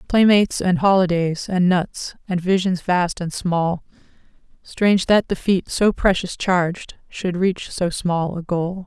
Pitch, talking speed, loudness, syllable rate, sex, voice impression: 180 Hz, 155 wpm, -19 LUFS, 4.0 syllables/s, female, very feminine, slightly young, very adult-like, thin, slightly relaxed, slightly weak, slightly dark, hard, clear, fluent, slightly cute, cool, very intellectual, refreshing, sincere, very calm, friendly, reassuring, unique, very elegant, slightly sweet, strict, sharp, slightly modest, light